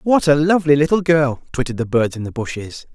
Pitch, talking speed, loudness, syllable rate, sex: 140 Hz, 225 wpm, -17 LUFS, 6.3 syllables/s, male